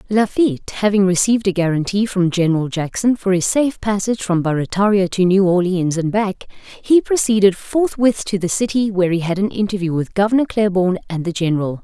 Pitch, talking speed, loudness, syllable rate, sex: 195 Hz, 185 wpm, -17 LUFS, 5.8 syllables/s, female